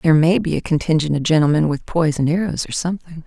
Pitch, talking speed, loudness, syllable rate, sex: 160 Hz, 220 wpm, -18 LUFS, 6.9 syllables/s, female